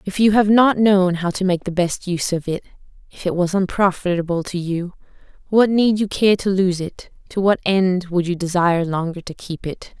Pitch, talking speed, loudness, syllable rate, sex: 185 Hz, 215 wpm, -19 LUFS, 5.1 syllables/s, female